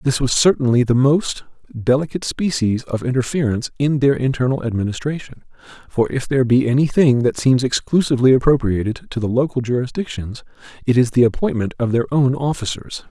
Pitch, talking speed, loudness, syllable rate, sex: 130 Hz, 160 wpm, -18 LUFS, 5.9 syllables/s, male